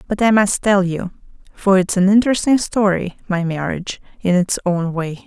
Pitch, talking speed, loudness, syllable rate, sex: 190 Hz, 180 wpm, -17 LUFS, 5.1 syllables/s, female